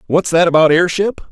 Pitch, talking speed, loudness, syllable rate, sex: 170 Hz, 185 wpm, -13 LUFS, 5.6 syllables/s, male